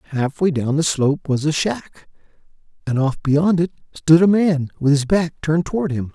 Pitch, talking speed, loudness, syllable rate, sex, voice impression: 155 Hz, 195 wpm, -18 LUFS, 5.0 syllables/s, male, masculine, middle-aged, slightly relaxed, slightly weak, soft, slightly raspy, cool, calm, slightly mature, friendly, reassuring, wild, kind, modest